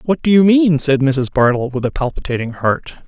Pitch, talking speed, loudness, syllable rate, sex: 140 Hz, 215 wpm, -15 LUFS, 5.1 syllables/s, male